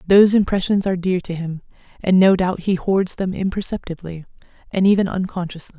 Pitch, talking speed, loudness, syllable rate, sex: 185 Hz, 165 wpm, -19 LUFS, 5.9 syllables/s, female